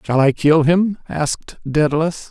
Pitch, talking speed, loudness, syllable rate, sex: 155 Hz, 155 wpm, -17 LUFS, 4.6 syllables/s, male